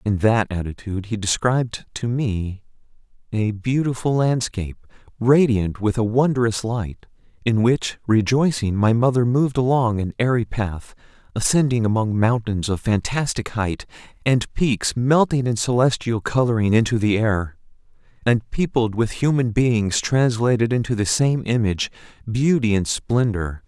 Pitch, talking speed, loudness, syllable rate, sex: 115 Hz, 135 wpm, -20 LUFS, 4.5 syllables/s, male